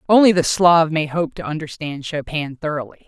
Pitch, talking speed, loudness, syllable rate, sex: 160 Hz, 175 wpm, -19 LUFS, 5.2 syllables/s, female